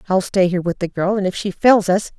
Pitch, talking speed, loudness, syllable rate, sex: 190 Hz, 305 wpm, -18 LUFS, 6.1 syllables/s, female